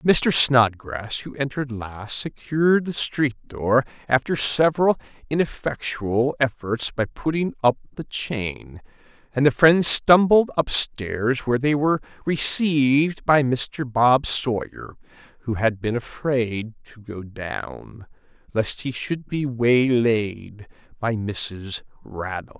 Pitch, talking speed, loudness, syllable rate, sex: 125 Hz, 120 wpm, -22 LUFS, 3.6 syllables/s, male